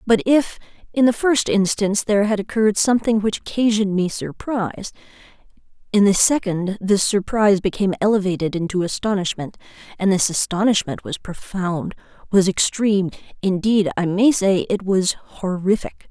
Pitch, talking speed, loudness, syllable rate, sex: 200 Hz, 130 wpm, -19 LUFS, 5.2 syllables/s, female